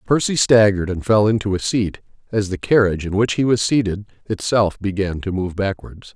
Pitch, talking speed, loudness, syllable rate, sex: 105 Hz, 195 wpm, -19 LUFS, 5.4 syllables/s, male